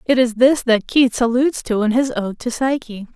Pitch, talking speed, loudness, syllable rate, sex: 245 Hz, 230 wpm, -17 LUFS, 5.4 syllables/s, female